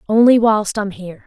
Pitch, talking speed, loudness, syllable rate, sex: 210 Hz, 190 wpm, -14 LUFS, 5.4 syllables/s, female